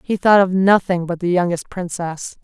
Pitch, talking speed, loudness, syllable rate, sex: 180 Hz, 195 wpm, -17 LUFS, 4.9 syllables/s, female